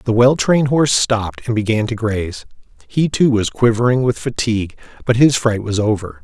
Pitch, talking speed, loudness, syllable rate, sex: 115 Hz, 195 wpm, -16 LUFS, 5.6 syllables/s, male